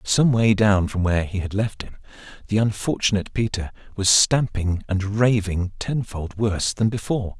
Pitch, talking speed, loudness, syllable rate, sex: 100 Hz, 160 wpm, -21 LUFS, 5.0 syllables/s, male